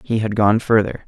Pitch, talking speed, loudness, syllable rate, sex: 110 Hz, 225 wpm, -17 LUFS, 5.4 syllables/s, male